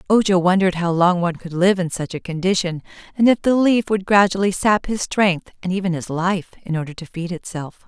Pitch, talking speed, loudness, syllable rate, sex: 185 Hz, 220 wpm, -19 LUFS, 5.6 syllables/s, female